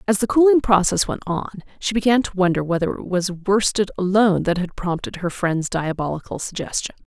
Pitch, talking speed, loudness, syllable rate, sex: 190 Hz, 185 wpm, -20 LUFS, 5.5 syllables/s, female